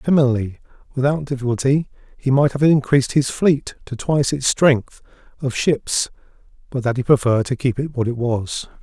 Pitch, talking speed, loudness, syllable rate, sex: 130 Hz, 170 wpm, -19 LUFS, 5.4 syllables/s, male